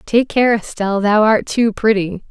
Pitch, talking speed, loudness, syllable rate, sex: 215 Hz, 180 wpm, -15 LUFS, 4.7 syllables/s, female